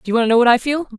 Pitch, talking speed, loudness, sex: 240 Hz, 485 wpm, -15 LUFS, female